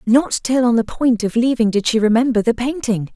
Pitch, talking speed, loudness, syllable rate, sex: 235 Hz, 230 wpm, -17 LUFS, 5.3 syllables/s, female